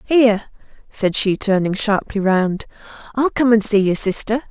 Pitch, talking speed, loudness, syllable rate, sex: 215 Hz, 160 wpm, -17 LUFS, 4.6 syllables/s, female